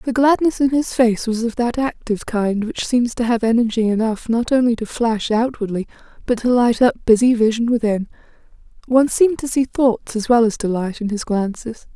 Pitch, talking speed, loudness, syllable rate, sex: 235 Hz, 200 wpm, -18 LUFS, 5.3 syllables/s, female